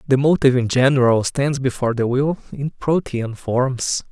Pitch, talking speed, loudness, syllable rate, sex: 130 Hz, 160 wpm, -19 LUFS, 4.9 syllables/s, male